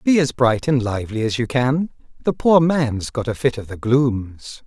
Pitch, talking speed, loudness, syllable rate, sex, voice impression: 130 Hz, 220 wpm, -19 LUFS, 4.5 syllables/s, male, masculine, adult-like, slightly middle-aged, slightly thick, slightly relaxed, slightly weak, bright, slightly soft, slightly clear, fluent, slightly cool, intellectual, refreshing, very sincere, very calm, slightly friendly, reassuring, unique, slightly wild, sweet, slightly lively, kind, slightly modest